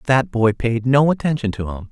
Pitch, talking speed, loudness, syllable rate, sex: 125 Hz, 250 wpm, -18 LUFS, 5.7 syllables/s, male